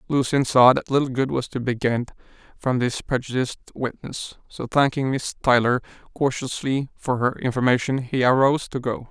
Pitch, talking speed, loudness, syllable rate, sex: 130 Hz, 165 wpm, -22 LUFS, 5.3 syllables/s, male